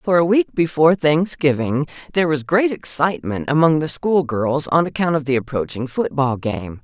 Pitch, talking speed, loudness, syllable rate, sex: 150 Hz, 165 wpm, -19 LUFS, 5.1 syllables/s, female